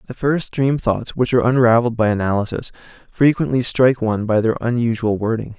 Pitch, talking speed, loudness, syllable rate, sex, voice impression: 120 Hz, 170 wpm, -18 LUFS, 6.0 syllables/s, male, masculine, adult-like, slightly thin, weak, slightly dark, raspy, sincere, calm, reassuring, kind, modest